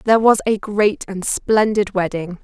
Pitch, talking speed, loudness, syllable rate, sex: 205 Hz, 175 wpm, -18 LUFS, 4.4 syllables/s, female